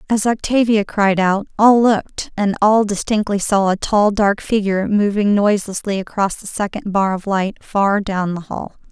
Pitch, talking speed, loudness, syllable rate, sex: 205 Hz, 175 wpm, -17 LUFS, 4.7 syllables/s, female